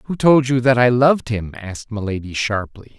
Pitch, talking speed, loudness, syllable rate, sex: 120 Hz, 200 wpm, -17 LUFS, 5.1 syllables/s, male